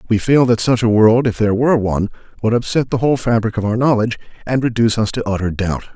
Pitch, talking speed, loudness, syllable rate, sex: 115 Hz, 240 wpm, -16 LUFS, 6.9 syllables/s, male